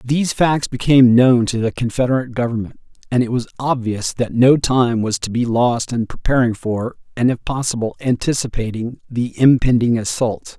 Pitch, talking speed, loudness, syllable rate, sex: 120 Hz, 165 wpm, -17 LUFS, 5.1 syllables/s, male